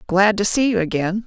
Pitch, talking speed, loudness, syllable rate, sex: 200 Hz, 235 wpm, -18 LUFS, 5.4 syllables/s, female